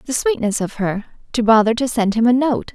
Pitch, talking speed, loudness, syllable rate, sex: 235 Hz, 240 wpm, -17 LUFS, 5.3 syllables/s, female